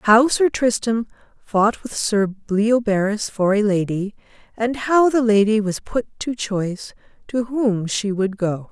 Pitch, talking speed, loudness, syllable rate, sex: 215 Hz, 160 wpm, -20 LUFS, 3.9 syllables/s, female